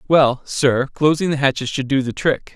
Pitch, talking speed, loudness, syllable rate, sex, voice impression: 140 Hz, 210 wpm, -18 LUFS, 4.8 syllables/s, male, masculine, adult-like, tensed, bright, slightly muffled, halting, calm, friendly, reassuring, slightly wild, kind